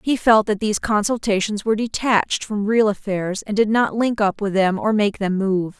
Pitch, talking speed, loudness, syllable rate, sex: 210 Hz, 215 wpm, -19 LUFS, 5.1 syllables/s, female